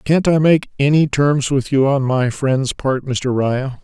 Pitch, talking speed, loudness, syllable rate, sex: 135 Hz, 205 wpm, -16 LUFS, 3.9 syllables/s, male